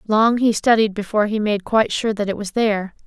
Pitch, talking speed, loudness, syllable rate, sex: 210 Hz, 235 wpm, -19 LUFS, 6.0 syllables/s, female